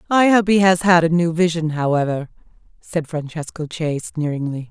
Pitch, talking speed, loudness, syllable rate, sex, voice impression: 165 Hz, 165 wpm, -18 LUFS, 5.3 syllables/s, female, very feminine, very adult-like, middle-aged, thin, slightly tensed, slightly powerful, bright, hard, very clear, fluent, cool, intellectual, very sincere, slightly calm, slightly friendly, reassuring, very elegant, kind